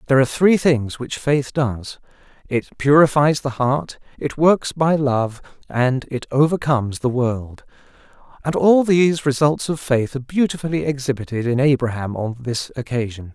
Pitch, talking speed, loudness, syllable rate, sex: 135 Hz, 155 wpm, -19 LUFS, 4.8 syllables/s, male